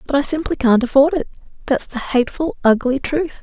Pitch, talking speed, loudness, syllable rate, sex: 275 Hz, 195 wpm, -17 LUFS, 5.6 syllables/s, female